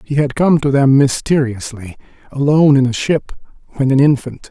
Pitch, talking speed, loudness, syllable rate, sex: 140 Hz, 175 wpm, -14 LUFS, 5.5 syllables/s, male